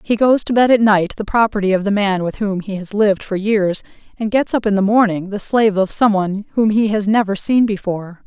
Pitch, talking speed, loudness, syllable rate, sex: 205 Hz, 255 wpm, -16 LUFS, 5.7 syllables/s, female